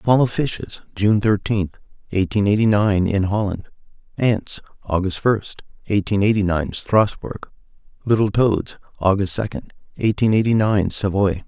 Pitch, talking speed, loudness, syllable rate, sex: 100 Hz, 130 wpm, -19 LUFS, 4.4 syllables/s, male